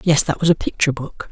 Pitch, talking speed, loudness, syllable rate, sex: 155 Hz, 275 wpm, -19 LUFS, 6.6 syllables/s, male